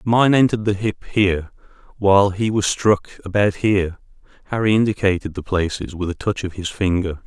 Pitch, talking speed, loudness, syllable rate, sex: 100 Hz, 175 wpm, -19 LUFS, 5.5 syllables/s, male